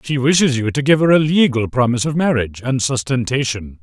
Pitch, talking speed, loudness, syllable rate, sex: 130 Hz, 205 wpm, -16 LUFS, 5.9 syllables/s, male